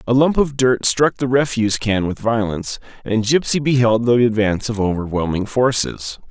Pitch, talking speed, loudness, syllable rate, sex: 115 Hz, 170 wpm, -18 LUFS, 5.1 syllables/s, male